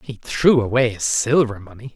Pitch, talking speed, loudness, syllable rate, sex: 120 Hz, 185 wpm, -18 LUFS, 5.0 syllables/s, male